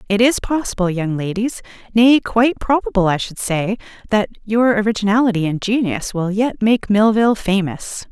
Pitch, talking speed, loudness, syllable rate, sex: 210 Hz, 140 wpm, -17 LUFS, 5.1 syllables/s, female